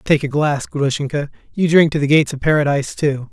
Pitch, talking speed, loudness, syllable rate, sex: 145 Hz, 215 wpm, -17 LUFS, 6.0 syllables/s, male